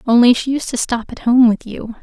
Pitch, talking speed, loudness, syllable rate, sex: 240 Hz, 265 wpm, -15 LUFS, 5.4 syllables/s, female